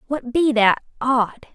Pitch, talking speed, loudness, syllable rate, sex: 250 Hz, 115 wpm, -19 LUFS, 3.5 syllables/s, female